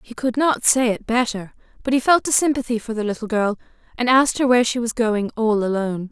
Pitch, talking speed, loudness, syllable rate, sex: 235 Hz, 235 wpm, -19 LUFS, 6.0 syllables/s, female